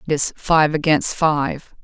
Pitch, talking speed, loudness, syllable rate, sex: 150 Hz, 165 wpm, -18 LUFS, 3.8 syllables/s, female